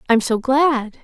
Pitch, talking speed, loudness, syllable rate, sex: 255 Hz, 175 wpm, -17 LUFS, 3.8 syllables/s, female